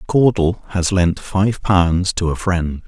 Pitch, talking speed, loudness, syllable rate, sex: 90 Hz, 165 wpm, -17 LUFS, 3.5 syllables/s, male